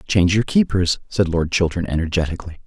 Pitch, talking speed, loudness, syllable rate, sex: 90 Hz, 155 wpm, -19 LUFS, 6.2 syllables/s, male